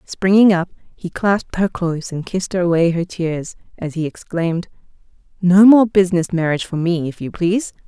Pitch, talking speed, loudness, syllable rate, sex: 180 Hz, 175 wpm, -17 LUFS, 5.3 syllables/s, female